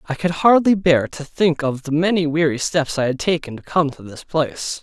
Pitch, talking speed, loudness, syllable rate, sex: 155 Hz, 235 wpm, -19 LUFS, 5.1 syllables/s, male